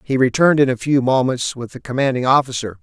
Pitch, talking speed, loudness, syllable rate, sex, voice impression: 130 Hz, 210 wpm, -17 LUFS, 6.3 syllables/s, male, very masculine, very adult-like, old, very thick, slightly tensed, powerful, slightly bright, slightly soft, clear, fluent, slightly raspy, very cool, intellectual, very sincere, calm, very mature, friendly, very reassuring, very unique, elegant, wild, slightly sweet, lively, strict